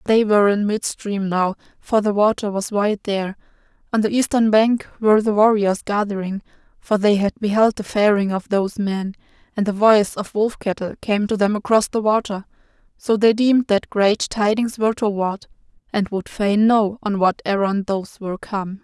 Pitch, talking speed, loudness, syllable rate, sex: 205 Hz, 185 wpm, -19 LUFS, 5.1 syllables/s, female